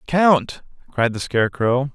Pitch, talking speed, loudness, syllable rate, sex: 135 Hz, 125 wpm, -19 LUFS, 3.9 syllables/s, male